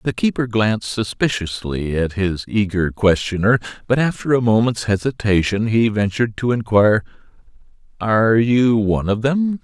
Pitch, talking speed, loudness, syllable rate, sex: 110 Hz, 135 wpm, -18 LUFS, 5.0 syllables/s, male